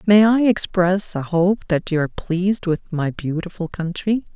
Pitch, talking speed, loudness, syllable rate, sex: 180 Hz, 180 wpm, -20 LUFS, 4.8 syllables/s, female